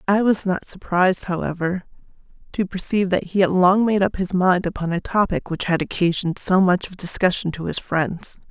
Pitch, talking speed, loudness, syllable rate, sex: 185 Hz, 200 wpm, -21 LUFS, 5.4 syllables/s, female